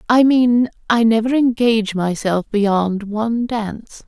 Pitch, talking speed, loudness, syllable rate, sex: 225 Hz, 130 wpm, -17 LUFS, 4.0 syllables/s, female